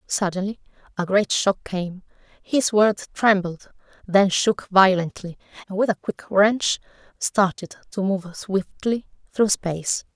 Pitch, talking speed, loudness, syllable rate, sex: 195 Hz, 130 wpm, -22 LUFS, 3.9 syllables/s, female